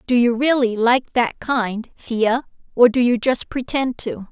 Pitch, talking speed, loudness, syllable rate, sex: 240 Hz, 180 wpm, -19 LUFS, 3.9 syllables/s, female